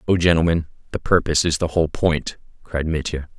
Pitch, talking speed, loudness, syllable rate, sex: 80 Hz, 175 wpm, -20 LUFS, 6.0 syllables/s, male